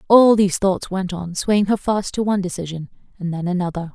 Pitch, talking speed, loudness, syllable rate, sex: 190 Hz, 215 wpm, -20 LUFS, 5.7 syllables/s, female